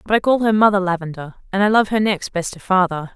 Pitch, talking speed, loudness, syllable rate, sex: 195 Hz, 265 wpm, -18 LUFS, 6.3 syllables/s, female